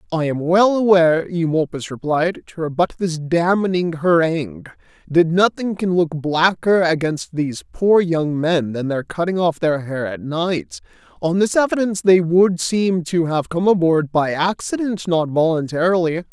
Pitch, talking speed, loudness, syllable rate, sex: 170 Hz, 160 wpm, -18 LUFS, 4.5 syllables/s, male